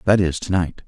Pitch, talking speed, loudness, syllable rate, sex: 90 Hz, 275 wpm, -20 LUFS, 5.5 syllables/s, male